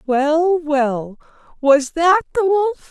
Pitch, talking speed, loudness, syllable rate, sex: 310 Hz, 125 wpm, -17 LUFS, 2.7 syllables/s, female